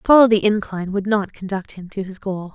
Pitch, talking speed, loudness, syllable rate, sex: 200 Hz, 260 wpm, -20 LUFS, 6.0 syllables/s, female